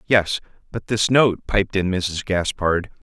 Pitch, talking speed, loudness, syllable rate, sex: 100 Hz, 155 wpm, -20 LUFS, 4.1 syllables/s, male